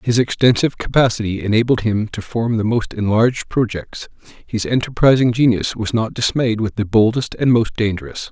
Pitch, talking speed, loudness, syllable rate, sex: 115 Hz, 165 wpm, -17 LUFS, 5.2 syllables/s, male